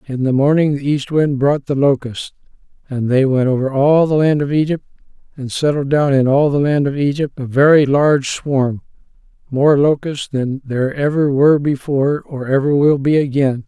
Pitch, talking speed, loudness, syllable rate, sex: 140 Hz, 190 wpm, -15 LUFS, 5.0 syllables/s, male